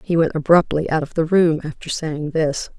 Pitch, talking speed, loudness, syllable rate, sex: 160 Hz, 215 wpm, -19 LUFS, 5.0 syllables/s, female